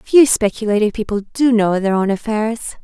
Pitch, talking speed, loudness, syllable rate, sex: 220 Hz, 170 wpm, -16 LUFS, 5.1 syllables/s, female